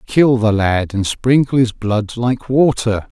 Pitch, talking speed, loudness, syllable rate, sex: 115 Hz, 170 wpm, -16 LUFS, 3.7 syllables/s, male